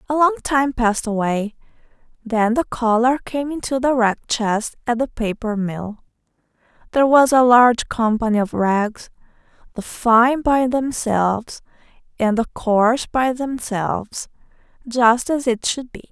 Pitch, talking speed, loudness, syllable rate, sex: 235 Hz, 140 wpm, -18 LUFS, 4.3 syllables/s, female